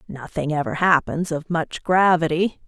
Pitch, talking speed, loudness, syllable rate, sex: 165 Hz, 135 wpm, -21 LUFS, 4.4 syllables/s, female